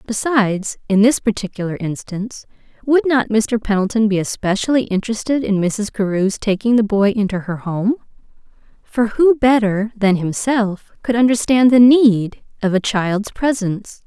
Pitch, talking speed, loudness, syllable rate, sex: 215 Hz, 140 wpm, -17 LUFS, 4.8 syllables/s, female